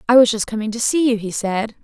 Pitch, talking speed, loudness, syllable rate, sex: 225 Hz, 295 wpm, -18 LUFS, 6.2 syllables/s, female